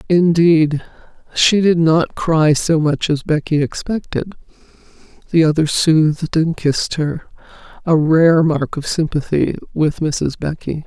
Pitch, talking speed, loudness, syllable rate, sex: 160 Hz, 120 wpm, -16 LUFS, 4.1 syllables/s, female